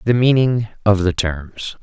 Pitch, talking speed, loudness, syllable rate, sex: 105 Hz, 165 wpm, -17 LUFS, 3.8 syllables/s, male